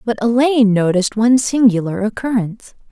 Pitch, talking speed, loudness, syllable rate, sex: 225 Hz, 125 wpm, -15 LUFS, 6.0 syllables/s, female